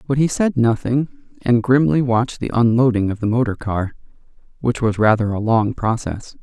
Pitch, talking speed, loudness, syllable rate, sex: 120 Hz, 175 wpm, -18 LUFS, 5.0 syllables/s, male